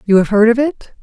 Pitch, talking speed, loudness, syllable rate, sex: 230 Hz, 290 wpm, -13 LUFS, 5.7 syllables/s, female